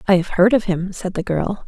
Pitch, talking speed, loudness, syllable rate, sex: 190 Hz, 285 wpm, -19 LUFS, 5.4 syllables/s, female